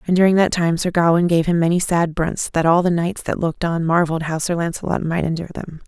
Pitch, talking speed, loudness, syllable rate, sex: 170 Hz, 255 wpm, -18 LUFS, 6.2 syllables/s, female